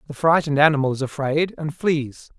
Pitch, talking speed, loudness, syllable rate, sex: 150 Hz, 175 wpm, -20 LUFS, 5.7 syllables/s, male